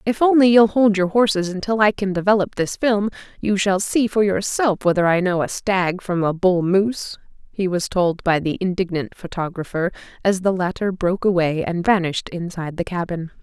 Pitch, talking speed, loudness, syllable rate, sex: 190 Hz, 190 wpm, -19 LUFS, 5.3 syllables/s, female